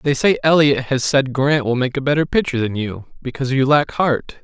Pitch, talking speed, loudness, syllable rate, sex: 135 Hz, 230 wpm, -17 LUFS, 5.3 syllables/s, male